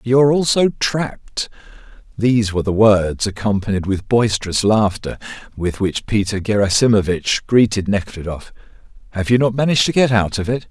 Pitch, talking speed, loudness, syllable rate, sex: 105 Hz, 145 wpm, -17 LUFS, 5.3 syllables/s, male